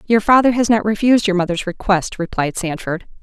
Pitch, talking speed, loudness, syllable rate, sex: 200 Hz, 185 wpm, -17 LUFS, 5.8 syllables/s, female